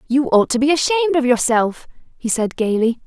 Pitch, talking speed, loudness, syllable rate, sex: 260 Hz, 195 wpm, -17 LUFS, 5.4 syllables/s, female